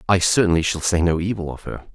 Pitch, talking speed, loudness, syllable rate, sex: 90 Hz, 245 wpm, -20 LUFS, 6.3 syllables/s, male